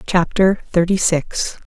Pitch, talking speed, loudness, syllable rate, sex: 180 Hz, 110 wpm, -17 LUFS, 3.7 syllables/s, female